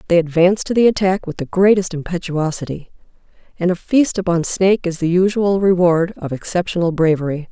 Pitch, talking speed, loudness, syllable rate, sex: 175 Hz, 170 wpm, -17 LUFS, 5.7 syllables/s, female